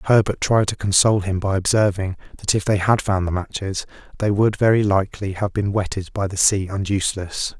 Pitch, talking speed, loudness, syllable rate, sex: 100 Hz, 205 wpm, -20 LUFS, 5.6 syllables/s, male